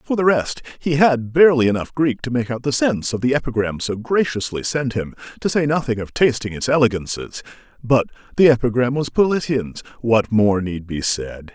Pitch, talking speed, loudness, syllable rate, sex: 125 Hz, 185 wpm, -19 LUFS, 5.3 syllables/s, male